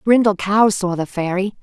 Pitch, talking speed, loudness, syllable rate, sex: 195 Hz, 185 wpm, -17 LUFS, 4.9 syllables/s, female